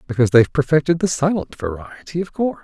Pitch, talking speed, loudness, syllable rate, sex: 150 Hz, 180 wpm, -19 LUFS, 6.9 syllables/s, male